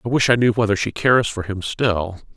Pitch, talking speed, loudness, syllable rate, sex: 110 Hz, 255 wpm, -19 LUFS, 5.8 syllables/s, male